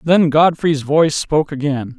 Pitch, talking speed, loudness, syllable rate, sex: 150 Hz, 150 wpm, -15 LUFS, 4.8 syllables/s, male